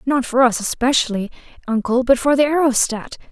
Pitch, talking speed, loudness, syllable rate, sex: 250 Hz, 165 wpm, -17 LUFS, 5.6 syllables/s, female